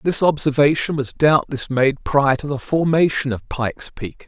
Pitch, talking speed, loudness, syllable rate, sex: 140 Hz, 170 wpm, -19 LUFS, 4.6 syllables/s, male